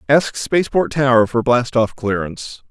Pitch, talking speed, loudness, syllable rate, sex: 125 Hz, 155 wpm, -17 LUFS, 5.0 syllables/s, male